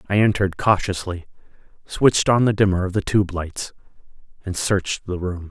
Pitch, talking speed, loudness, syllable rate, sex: 95 Hz, 165 wpm, -20 LUFS, 5.5 syllables/s, male